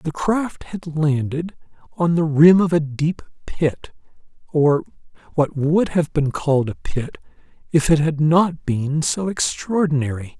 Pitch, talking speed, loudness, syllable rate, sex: 155 Hz, 150 wpm, -19 LUFS, 3.9 syllables/s, male